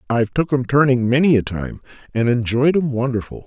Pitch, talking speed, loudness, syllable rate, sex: 125 Hz, 190 wpm, -18 LUFS, 5.7 syllables/s, male